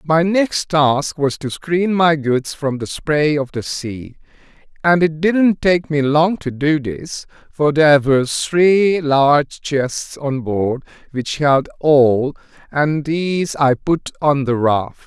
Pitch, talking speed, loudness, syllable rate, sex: 150 Hz, 165 wpm, -17 LUFS, 3.5 syllables/s, male